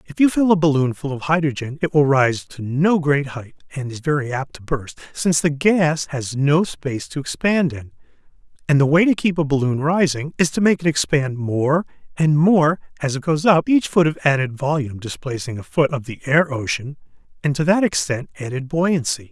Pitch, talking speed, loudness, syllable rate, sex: 150 Hz, 210 wpm, -19 LUFS, 4.9 syllables/s, male